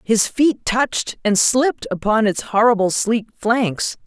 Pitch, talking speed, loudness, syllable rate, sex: 225 Hz, 150 wpm, -18 LUFS, 4.0 syllables/s, female